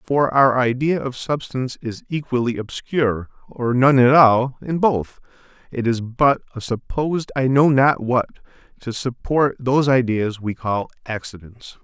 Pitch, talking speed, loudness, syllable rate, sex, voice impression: 125 Hz, 150 wpm, -19 LUFS, 4.4 syllables/s, male, very masculine, slightly old, very thick, tensed, very powerful, bright, soft, muffled, fluent, very cool, intellectual, slightly refreshing, very sincere, very calm, very mature, friendly, very reassuring, unique, elegant, wild, slightly sweet, lively, kind, slightly intense